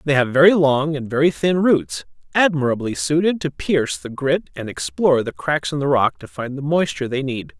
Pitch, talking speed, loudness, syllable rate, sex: 140 Hz, 215 wpm, -19 LUFS, 5.3 syllables/s, male